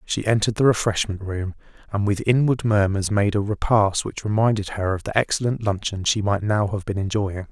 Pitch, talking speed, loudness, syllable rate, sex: 105 Hz, 200 wpm, -22 LUFS, 5.4 syllables/s, male